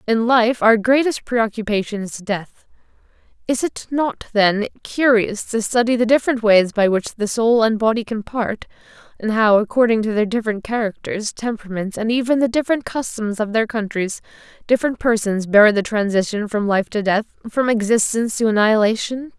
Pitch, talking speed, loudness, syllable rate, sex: 225 Hz, 165 wpm, -18 LUFS, 5.3 syllables/s, female